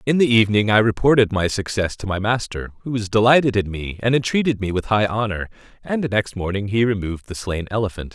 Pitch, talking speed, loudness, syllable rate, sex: 105 Hz, 215 wpm, -20 LUFS, 6.0 syllables/s, male